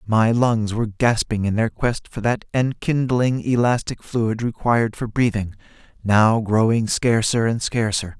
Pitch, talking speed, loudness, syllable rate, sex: 115 Hz, 145 wpm, -20 LUFS, 4.2 syllables/s, male